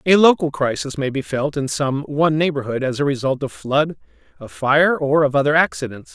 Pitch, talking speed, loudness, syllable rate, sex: 140 Hz, 205 wpm, -19 LUFS, 5.4 syllables/s, male